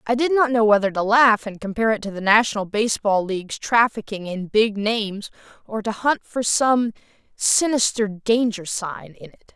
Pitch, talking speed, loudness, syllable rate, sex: 215 Hz, 180 wpm, -20 LUFS, 5.1 syllables/s, female